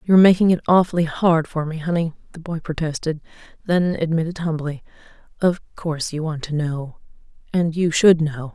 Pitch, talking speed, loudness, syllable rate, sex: 160 Hz, 170 wpm, -20 LUFS, 5.3 syllables/s, female